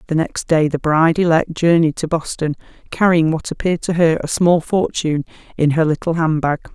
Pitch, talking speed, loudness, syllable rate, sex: 160 Hz, 195 wpm, -17 LUFS, 5.6 syllables/s, female